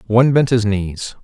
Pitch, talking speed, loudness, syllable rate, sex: 110 Hz, 195 wpm, -16 LUFS, 4.9 syllables/s, male